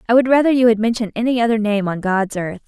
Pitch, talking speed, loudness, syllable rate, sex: 225 Hz, 270 wpm, -17 LUFS, 7.0 syllables/s, female